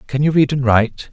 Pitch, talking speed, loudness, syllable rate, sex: 130 Hz, 270 wpm, -15 LUFS, 6.3 syllables/s, male